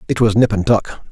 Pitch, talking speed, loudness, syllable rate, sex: 110 Hz, 270 wpm, -15 LUFS, 6.6 syllables/s, male